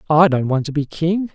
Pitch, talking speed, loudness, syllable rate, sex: 160 Hz, 270 wpm, -18 LUFS, 5.3 syllables/s, male